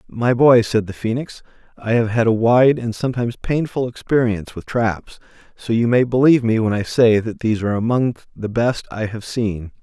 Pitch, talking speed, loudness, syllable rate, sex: 115 Hz, 200 wpm, -18 LUFS, 5.4 syllables/s, male